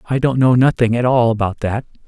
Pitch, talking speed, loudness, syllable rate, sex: 120 Hz, 230 wpm, -16 LUFS, 5.7 syllables/s, male